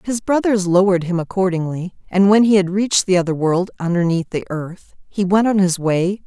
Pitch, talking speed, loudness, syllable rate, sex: 185 Hz, 200 wpm, -17 LUFS, 5.4 syllables/s, female